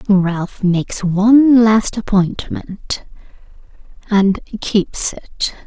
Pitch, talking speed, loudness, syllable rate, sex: 200 Hz, 75 wpm, -16 LUFS, 2.8 syllables/s, female